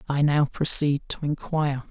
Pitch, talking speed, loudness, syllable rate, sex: 145 Hz, 155 wpm, -22 LUFS, 4.8 syllables/s, male